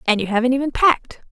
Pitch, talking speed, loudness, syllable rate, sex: 250 Hz, 230 wpm, -18 LUFS, 7.5 syllables/s, female